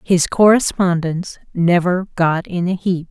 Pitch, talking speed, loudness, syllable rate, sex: 180 Hz, 135 wpm, -16 LUFS, 4.3 syllables/s, female